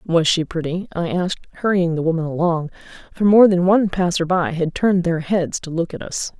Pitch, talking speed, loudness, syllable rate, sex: 175 Hz, 215 wpm, -19 LUFS, 5.6 syllables/s, female